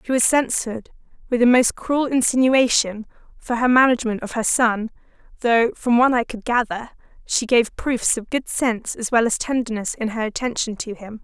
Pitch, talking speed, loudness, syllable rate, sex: 235 Hz, 185 wpm, -20 LUFS, 5.2 syllables/s, female